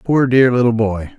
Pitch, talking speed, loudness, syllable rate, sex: 115 Hz, 205 wpm, -14 LUFS, 4.9 syllables/s, male